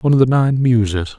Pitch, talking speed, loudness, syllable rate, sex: 120 Hz, 255 wpm, -15 LUFS, 6.1 syllables/s, male